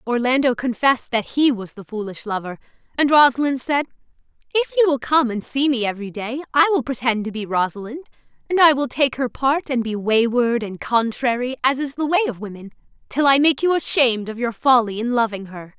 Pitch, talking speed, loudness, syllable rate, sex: 250 Hz, 200 wpm, -19 LUFS, 5.7 syllables/s, female